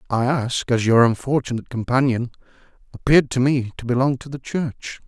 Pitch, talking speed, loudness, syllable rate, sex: 125 Hz, 165 wpm, -20 LUFS, 5.6 syllables/s, male